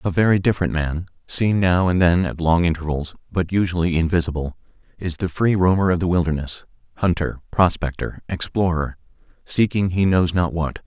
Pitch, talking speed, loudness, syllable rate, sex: 85 Hz, 155 wpm, -20 LUFS, 5.3 syllables/s, male